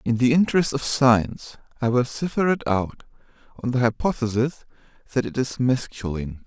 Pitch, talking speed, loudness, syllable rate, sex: 125 Hz, 160 wpm, -23 LUFS, 5.3 syllables/s, male